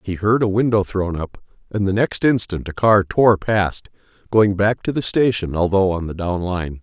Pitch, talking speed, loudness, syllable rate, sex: 100 Hz, 210 wpm, -18 LUFS, 4.6 syllables/s, male